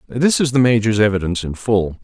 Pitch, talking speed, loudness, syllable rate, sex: 110 Hz, 205 wpm, -17 LUFS, 6.0 syllables/s, male